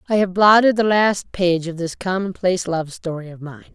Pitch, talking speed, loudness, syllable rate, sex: 180 Hz, 210 wpm, -18 LUFS, 5.2 syllables/s, female